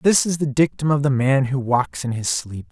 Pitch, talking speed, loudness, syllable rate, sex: 135 Hz, 265 wpm, -20 LUFS, 4.9 syllables/s, male